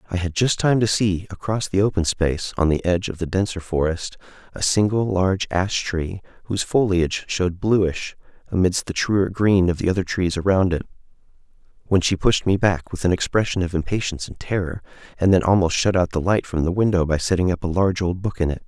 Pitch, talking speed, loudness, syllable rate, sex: 90 Hz, 215 wpm, -21 LUFS, 5.8 syllables/s, male